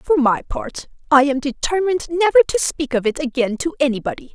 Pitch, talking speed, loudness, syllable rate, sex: 280 Hz, 195 wpm, -18 LUFS, 5.6 syllables/s, female